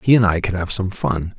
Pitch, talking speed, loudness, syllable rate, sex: 95 Hz, 305 wpm, -19 LUFS, 5.5 syllables/s, male